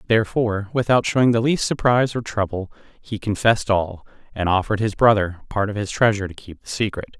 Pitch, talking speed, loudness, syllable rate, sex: 105 Hz, 190 wpm, -20 LUFS, 6.2 syllables/s, male